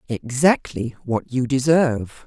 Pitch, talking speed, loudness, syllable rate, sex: 130 Hz, 105 wpm, -20 LUFS, 4.3 syllables/s, female